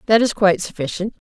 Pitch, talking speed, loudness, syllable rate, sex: 200 Hz, 190 wpm, -19 LUFS, 6.8 syllables/s, female